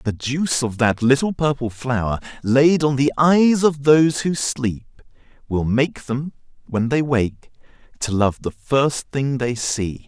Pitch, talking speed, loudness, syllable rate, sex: 130 Hz, 165 wpm, -19 LUFS, 3.9 syllables/s, male